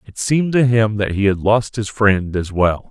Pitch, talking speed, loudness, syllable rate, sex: 105 Hz, 250 wpm, -17 LUFS, 4.7 syllables/s, male